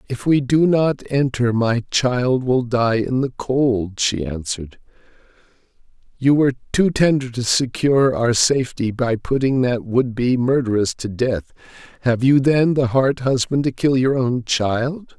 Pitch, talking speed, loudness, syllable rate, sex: 125 Hz, 160 wpm, -18 LUFS, 4.2 syllables/s, male